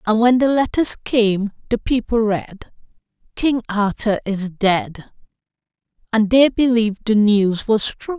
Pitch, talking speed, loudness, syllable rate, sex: 220 Hz, 140 wpm, -18 LUFS, 3.9 syllables/s, female